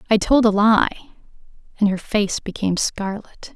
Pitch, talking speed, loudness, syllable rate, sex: 210 Hz, 150 wpm, -19 LUFS, 4.5 syllables/s, female